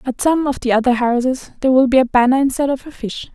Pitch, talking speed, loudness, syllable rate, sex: 255 Hz, 270 wpm, -16 LUFS, 6.5 syllables/s, female